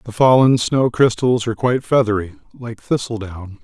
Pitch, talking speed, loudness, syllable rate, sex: 115 Hz, 150 wpm, -17 LUFS, 5.2 syllables/s, male